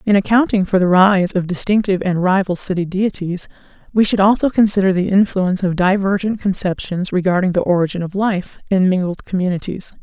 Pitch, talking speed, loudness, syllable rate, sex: 190 Hz, 170 wpm, -16 LUFS, 5.7 syllables/s, female